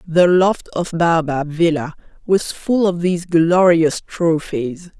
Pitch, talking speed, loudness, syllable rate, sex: 170 Hz, 130 wpm, -17 LUFS, 3.6 syllables/s, female